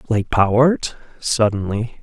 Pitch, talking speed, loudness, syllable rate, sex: 115 Hz, 90 wpm, -18 LUFS, 3.9 syllables/s, male